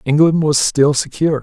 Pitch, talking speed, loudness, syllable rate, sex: 145 Hz, 170 wpm, -14 LUFS, 5.3 syllables/s, male